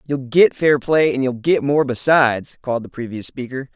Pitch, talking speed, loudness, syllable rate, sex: 135 Hz, 210 wpm, -18 LUFS, 5.2 syllables/s, male